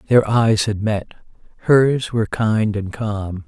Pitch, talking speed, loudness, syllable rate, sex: 110 Hz, 155 wpm, -18 LUFS, 3.8 syllables/s, male